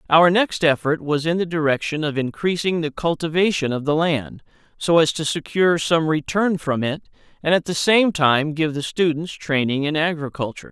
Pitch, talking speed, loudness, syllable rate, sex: 160 Hz, 185 wpm, -20 LUFS, 5.1 syllables/s, male